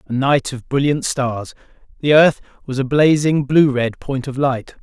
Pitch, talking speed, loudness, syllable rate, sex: 135 Hz, 185 wpm, -17 LUFS, 4.3 syllables/s, male